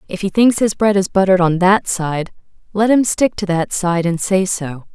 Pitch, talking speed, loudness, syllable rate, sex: 190 Hz, 230 wpm, -16 LUFS, 4.9 syllables/s, female